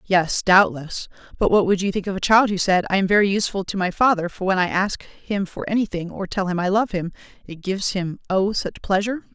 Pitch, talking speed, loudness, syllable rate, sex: 190 Hz, 240 wpm, -21 LUFS, 5.8 syllables/s, female